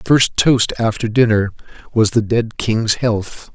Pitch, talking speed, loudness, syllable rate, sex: 110 Hz, 170 wpm, -16 LUFS, 4.0 syllables/s, male